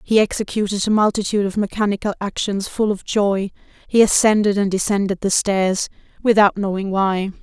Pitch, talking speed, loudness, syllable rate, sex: 200 Hz, 155 wpm, -19 LUFS, 5.4 syllables/s, female